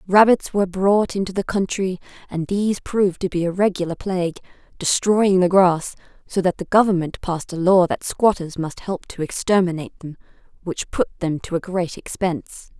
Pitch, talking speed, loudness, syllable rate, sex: 185 Hz, 180 wpm, -20 LUFS, 5.3 syllables/s, female